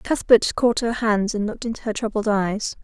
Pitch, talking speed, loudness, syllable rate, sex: 220 Hz, 210 wpm, -21 LUFS, 5.2 syllables/s, female